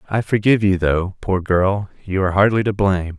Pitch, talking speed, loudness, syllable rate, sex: 95 Hz, 205 wpm, -18 LUFS, 5.7 syllables/s, male